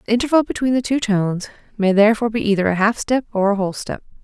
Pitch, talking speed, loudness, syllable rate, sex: 215 Hz, 240 wpm, -18 LUFS, 7.3 syllables/s, female